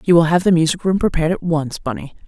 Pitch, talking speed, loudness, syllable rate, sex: 165 Hz, 265 wpm, -17 LUFS, 6.8 syllables/s, female